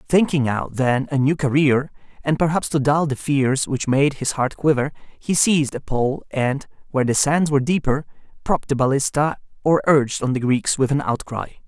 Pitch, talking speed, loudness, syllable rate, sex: 140 Hz, 195 wpm, -20 LUFS, 5.1 syllables/s, male